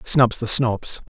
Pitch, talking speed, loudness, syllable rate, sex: 120 Hz, 155 wpm, -19 LUFS, 3.2 syllables/s, male